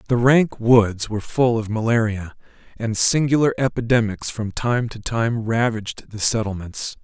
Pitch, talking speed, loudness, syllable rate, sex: 115 Hz, 145 wpm, -20 LUFS, 4.5 syllables/s, male